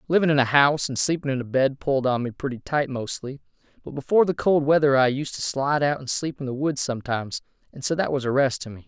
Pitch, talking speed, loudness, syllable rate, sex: 140 Hz, 265 wpm, -23 LUFS, 6.6 syllables/s, male